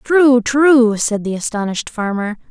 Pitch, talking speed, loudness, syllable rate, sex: 240 Hz, 145 wpm, -15 LUFS, 4.3 syllables/s, female